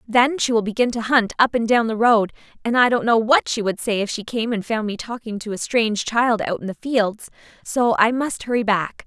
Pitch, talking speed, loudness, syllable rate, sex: 225 Hz, 260 wpm, -20 LUFS, 5.2 syllables/s, female